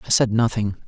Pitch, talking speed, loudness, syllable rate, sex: 110 Hz, 205 wpm, -20 LUFS, 5.9 syllables/s, male